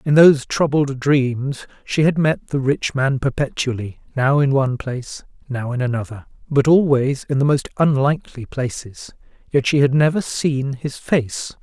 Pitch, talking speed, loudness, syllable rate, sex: 135 Hz, 165 wpm, -19 LUFS, 4.6 syllables/s, male